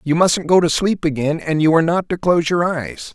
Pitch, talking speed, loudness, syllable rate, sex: 165 Hz, 265 wpm, -17 LUFS, 5.6 syllables/s, male